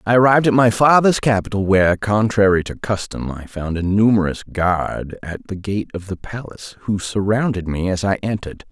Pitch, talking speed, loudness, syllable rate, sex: 100 Hz, 185 wpm, -18 LUFS, 5.2 syllables/s, male